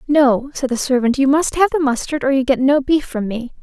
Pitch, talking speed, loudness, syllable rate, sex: 270 Hz, 265 wpm, -17 LUFS, 5.4 syllables/s, female